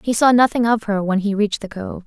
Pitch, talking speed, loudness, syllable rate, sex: 210 Hz, 290 wpm, -18 LUFS, 6.1 syllables/s, female